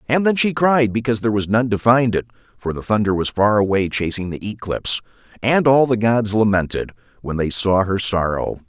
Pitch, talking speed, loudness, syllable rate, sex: 110 Hz, 205 wpm, -18 LUFS, 5.5 syllables/s, male